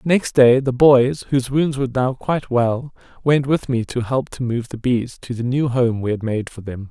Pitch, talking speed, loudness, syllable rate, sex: 125 Hz, 245 wpm, -19 LUFS, 4.9 syllables/s, male